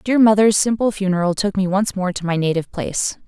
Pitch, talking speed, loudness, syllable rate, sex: 195 Hz, 220 wpm, -18 LUFS, 6.0 syllables/s, female